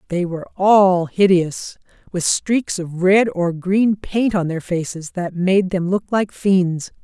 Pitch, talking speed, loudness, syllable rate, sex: 185 Hz, 160 wpm, -18 LUFS, 3.7 syllables/s, female